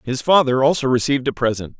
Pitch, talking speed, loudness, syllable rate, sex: 130 Hz, 200 wpm, -17 LUFS, 6.5 syllables/s, male